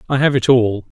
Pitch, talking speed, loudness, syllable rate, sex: 125 Hz, 240 wpm, -15 LUFS, 5.6 syllables/s, male